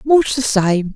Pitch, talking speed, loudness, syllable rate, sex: 230 Hz, 190 wpm, -16 LUFS, 3.5 syllables/s, male